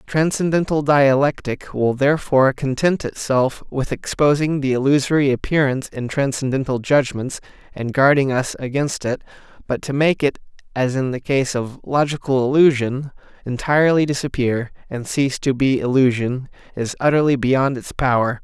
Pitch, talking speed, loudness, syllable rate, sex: 135 Hz, 135 wpm, -19 LUFS, 5.1 syllables/s, male